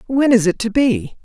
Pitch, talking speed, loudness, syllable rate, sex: 240 Hz, 240 wpm, -16 LUFS, 4.8 syllables/s, female